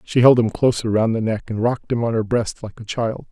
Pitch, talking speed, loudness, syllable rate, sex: 115 Hz, 290 wpm, -19 LUFS, 5.7 syllables/s, male